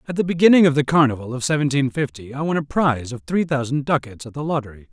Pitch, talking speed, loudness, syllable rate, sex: 140 Hz, 245 wpm, -20 LUFS, 6.8 syllables/s, male